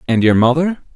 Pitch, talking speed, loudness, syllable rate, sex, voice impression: 140 Hz, 190 wpm, -14 LUFS, 5.9 syllables/s, male, masculine, adult-like, slightly thick, slightly refreshing, sincere, slightly elegant